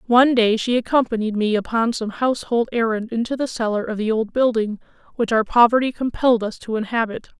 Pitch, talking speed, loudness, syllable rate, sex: 230 Hz, 185 wpm, -20 LUFS, 5.9 syllables/s, female